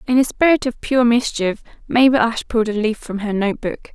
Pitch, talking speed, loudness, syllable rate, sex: 235 Hz, 230 wpm, -18 LUFS, 5.7 syllables/s, female